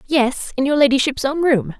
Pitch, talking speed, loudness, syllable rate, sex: 270 Hz, 200 wpm, -17 LUFS, 5.0 syllables/s, female